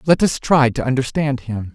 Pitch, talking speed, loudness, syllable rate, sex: 135 Hz, 205 wpm, -18 LUFS, 4.9 syllables/s, male